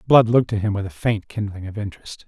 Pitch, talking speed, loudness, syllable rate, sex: 105 Hz, 265 wpm, -21 LUFS, 6.6 syllables/s, male